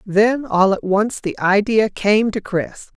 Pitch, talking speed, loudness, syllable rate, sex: 210 Hz, 180 wpm, -17 LUFS, 3.6 syllables/s, female